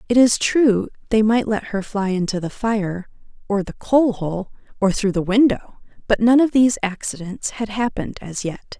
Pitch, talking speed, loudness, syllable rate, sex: 210 Hz, 190 wpm, -20 LUFS, 4.7 syllables/s, female